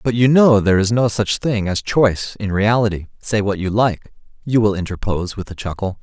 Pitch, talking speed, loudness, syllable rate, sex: 105 Hz, 220 wpm, -17 LUFS, 5.5 syllables/s, male